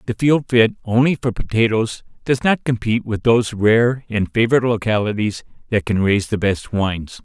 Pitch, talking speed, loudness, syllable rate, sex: 110 Hz, 175 wpm, -18 LUFS, 5.3 syllables/s, male